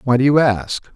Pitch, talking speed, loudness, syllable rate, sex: 130 Hz, 255 wpm, -16 LUFS, 5.3 syllables/s, male